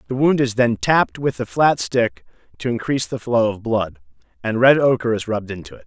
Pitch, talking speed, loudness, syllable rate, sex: 115 Hz, 225 wpm, -19 LUFS, 5.7 syllables/s, male